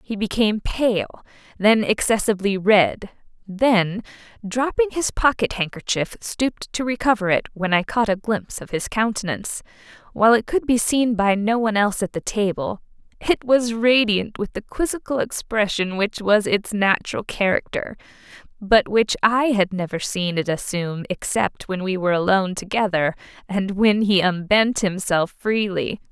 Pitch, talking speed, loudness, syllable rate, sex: 210 Hz, 155 wpm, -21 LUFS, 4.8 syllables/s, female